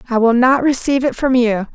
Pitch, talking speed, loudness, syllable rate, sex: 250 Hz, 240 wpm, -15 LUFS, 6.0 syllables/s, female